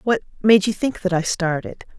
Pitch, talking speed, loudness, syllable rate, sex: 195 Hz, 210 wpm, -20 LUFS, 5.1 syllables/s, female